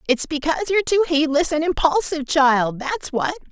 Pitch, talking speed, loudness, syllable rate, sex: 290 Hz, 170 wpm, -19 LUFS, 6.0 syllables/s, female